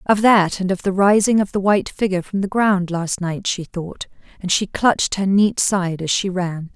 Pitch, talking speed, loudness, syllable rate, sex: 190 Hz, 230 wpm, -18 LUFS, 4.9 syllables/s, female